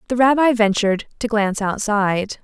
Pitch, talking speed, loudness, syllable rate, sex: 215 Hz, 150 wpm, -18 LUFS, 5.6 syllables/s, female